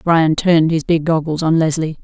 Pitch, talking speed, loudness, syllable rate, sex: 160 Hz, 205 wpm, -15 LUFS, 5.1 syllables/s, female